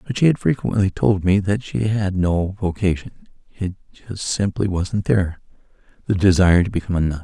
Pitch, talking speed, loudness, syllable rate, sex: 95 Hz, 175 wpm, -20 LUFS, 5.7 syllables/s, male